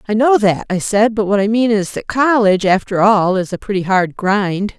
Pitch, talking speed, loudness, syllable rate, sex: 205 Hz, 240 wpm, -15 LUFS, 5.1 syllables/s, female